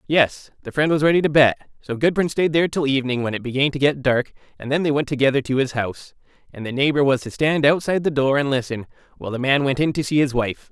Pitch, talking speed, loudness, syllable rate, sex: 140 Hz, 265 wpm, -20 LUFS, 6.5 syllables/s, male